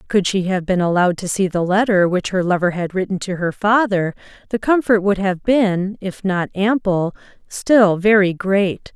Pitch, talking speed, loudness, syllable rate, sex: 195 Hz, 190 wpm, -17 LUFS, 4.6 syllables/s, female